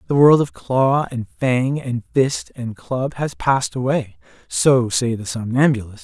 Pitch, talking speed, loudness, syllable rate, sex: 125 Hz, 160 wpm, -19 LUFS, 4.1 syllables/s, male